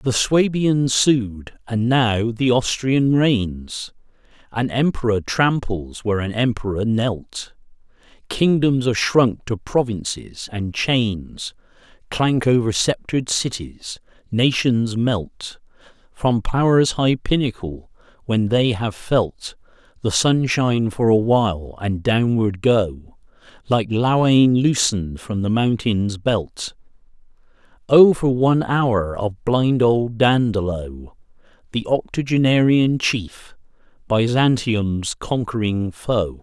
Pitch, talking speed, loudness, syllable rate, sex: 115 Hz, 105 wpm, -19 LUFS, 3.5 syllables/s, male